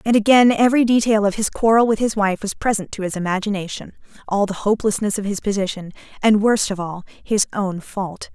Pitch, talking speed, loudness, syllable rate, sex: 205 Hz, 200 wpm, -19 LUFS, 5.8 syllables/s, female